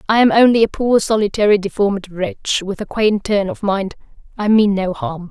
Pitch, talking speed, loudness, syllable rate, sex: 200 Hz, 205 wpm, -16 LUFS, 5.1 syllables/s, female